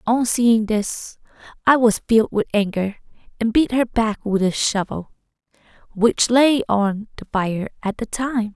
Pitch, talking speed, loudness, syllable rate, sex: 220 Hz, 160 wpm, -19 LUFS, 4.1 syllables/s, female